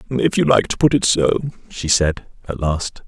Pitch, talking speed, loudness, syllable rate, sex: 110 Hz, 215 wpm, -18 LUFS, 4.7 syllables/s, male